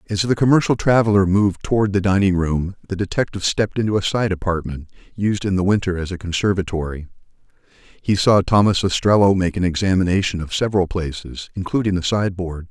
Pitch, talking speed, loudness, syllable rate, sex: 95 Hz, 170 wpm, -19 LUFS, 6.1 syllables/s, male